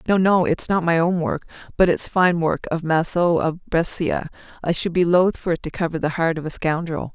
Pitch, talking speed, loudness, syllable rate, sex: 170 Hz, 235 wpm, -21 LUFS, 5.0 syllables/s, female